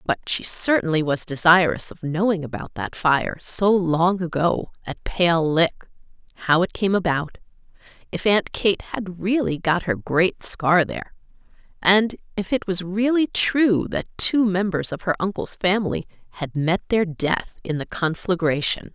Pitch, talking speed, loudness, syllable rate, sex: 180 Hz, 160 wpm, -21 LUFS, 4.3 syllables/s, female